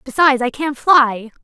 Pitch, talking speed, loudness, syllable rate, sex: 270 Hz, 165 wpm, -15 LUFS, 4.9 syllables/s, female